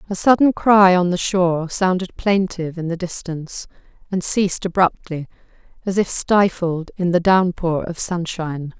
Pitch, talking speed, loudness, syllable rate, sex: 180 Hz, 150 wpm, -19 LUFS, 4.8 syllables/s, female